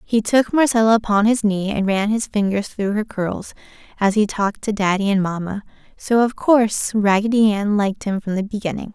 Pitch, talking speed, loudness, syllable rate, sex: 210 Hz, 200 wpm, -19 LUFS, 5.3 syllables/s, female